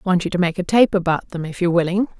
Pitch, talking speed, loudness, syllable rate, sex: 180 Hz, 300 wpm, -19 LUFS, 7.0 syllables/s, female